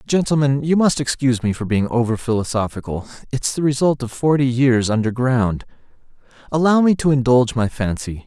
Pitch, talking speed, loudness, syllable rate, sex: 130 Hz, 160 wpm, -18 LUFS, 5.5 syllables/s, male